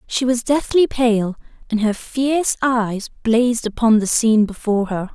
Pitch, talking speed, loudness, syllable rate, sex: 230 Hz, 165 wpm, -18 LUFS, 4.7 syllables/s, female